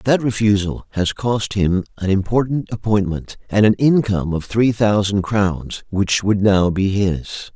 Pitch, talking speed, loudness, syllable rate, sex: 100 Hz, 160 wpm, -18 LUFS, 4.3 syllables/s, male